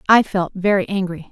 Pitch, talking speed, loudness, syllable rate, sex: 190 Hz, 185 wpm, -18 LUFS, 5.3 syllables/s, female